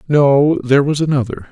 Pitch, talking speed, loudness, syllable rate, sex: 140 Hz, 160 wpm, -14 LUFS, 5.4 syllables/s, male